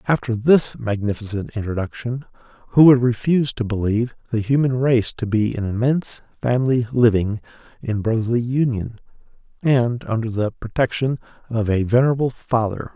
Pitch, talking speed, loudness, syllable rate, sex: 120 Hz, 135 wpm, -20 LUFS, 5.3 syllables/s, male